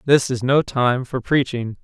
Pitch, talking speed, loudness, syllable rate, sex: 130 Hz, 195 wpm, -19 LUFS, 4.2 syllables/s, male